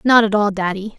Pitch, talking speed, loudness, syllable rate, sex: 205 Hz, 245 wpm, -17 LUFS, 5.6 syllables/s, female